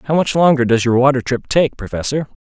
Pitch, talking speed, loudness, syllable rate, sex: 130 Hz, 220 wpm, -15 LUFS, 5.7 syllables/s, male